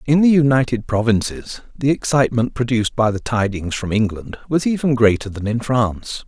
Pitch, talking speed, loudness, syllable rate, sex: 120 Hz, 170 wpm, -18 LUFS, 5.4 syllables/s, male